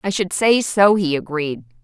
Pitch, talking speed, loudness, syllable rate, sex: 180 Hz, 195 wpm, -18 LUFS, 4.4 syllables/s, female